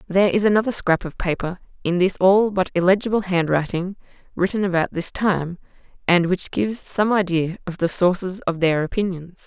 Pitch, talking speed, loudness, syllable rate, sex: 185 Hz, 170 wpm, -21 LUFS, 5.3 syllables/s, female